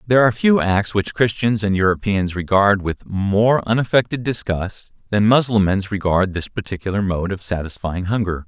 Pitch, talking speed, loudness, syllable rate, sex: 100 Hz, 155 wpm, -19 LUFS, 5.1 syllables/s, male